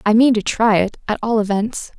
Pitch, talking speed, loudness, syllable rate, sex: 220 Hz, 240 wpm, -17 LUFS, 5.2 syllables/s, female